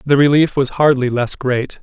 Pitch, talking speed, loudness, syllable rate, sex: 135 Hz, 195 wpm, -15 LUFS, 4.6 syllables/s, male